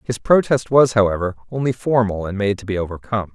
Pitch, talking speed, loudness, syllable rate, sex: 110 Hz, 195 wpm, -19 LUFS, 6.1 syllables/s, male